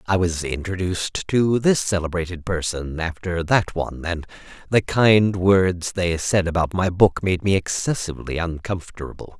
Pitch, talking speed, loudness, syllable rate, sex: 90 Hz, 145 wpm, -21 LUFS, 4.7 syllables/s, male